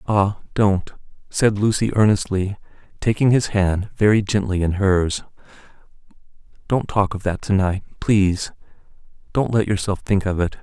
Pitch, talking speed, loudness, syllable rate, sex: 100 Hz, 140 wpm, -20 LUFS, 4.5 syllables/s, male